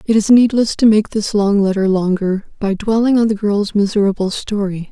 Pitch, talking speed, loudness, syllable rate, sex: 205 Hz, 195 wpm, -15 LUFS, 5.1 syllables/s, female